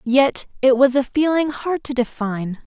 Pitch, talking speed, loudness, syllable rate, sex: 260 Hz, 175 wpm, -19 LUFS, 4.6 syllables/s, female